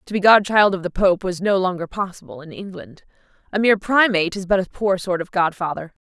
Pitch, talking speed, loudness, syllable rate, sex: 190 Hz, 215 wpm, -19 LUFS, 6.0 syllables/s, female